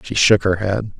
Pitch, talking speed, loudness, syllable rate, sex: 100 Hz, 240 wpm, -16 LUFS, 4.7 syllables/s, male